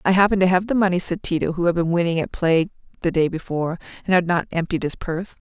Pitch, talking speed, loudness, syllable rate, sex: 175 Hz, 250 wpm, -21 LUFS, 6.8 syllables/s, female